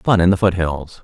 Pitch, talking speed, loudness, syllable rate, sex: 90 Hz, 230 wpm, -17 LUFS, 5.1 syllables/s, male